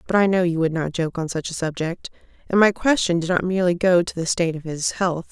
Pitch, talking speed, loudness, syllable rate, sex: 175 Hz, 270 wpm, -21 LUFS, 6.1 syllables/s, female